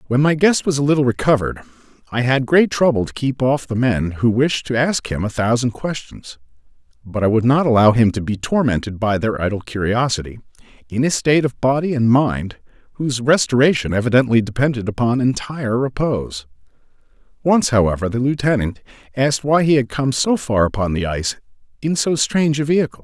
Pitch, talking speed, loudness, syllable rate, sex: 125 Hz, 180 wpm, -18 LUFS, 5.8 syllables/s, male